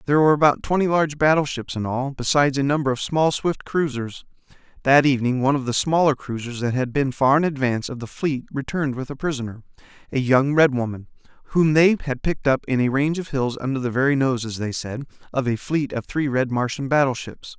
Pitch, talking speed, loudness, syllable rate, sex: 135 Hz, 210 wpm, -21 LUFS, 6.1 syllables/s, male